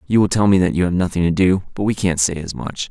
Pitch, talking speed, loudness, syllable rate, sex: 90 Hz, 330 wpm, -18 LUFS, 6.4 syllables/s, male